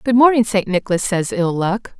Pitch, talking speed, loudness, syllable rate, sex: 205 Hz, 210 wpm, -17 LUFS, 5.3 syllables/s, female